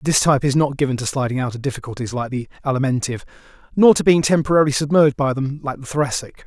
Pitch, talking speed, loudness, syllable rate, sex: 135 Hz, 215 wpm, -19 LUFS, 7.3 syllables/s, male